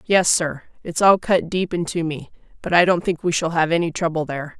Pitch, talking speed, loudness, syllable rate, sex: 165 Hz, 235 wpm, -20 LUFS, 5.5 syllables/s, female